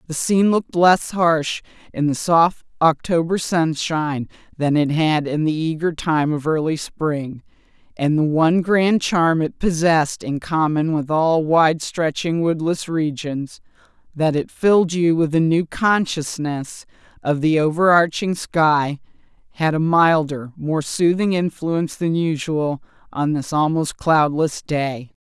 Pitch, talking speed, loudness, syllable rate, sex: 160 Hz, 140 wpm, -19 LUFS, 4.0 syllables/s, female